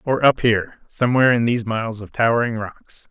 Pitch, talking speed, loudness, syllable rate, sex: 115 Hz, 195 wpm, -19 LUFS, 6.2 syllables/s, male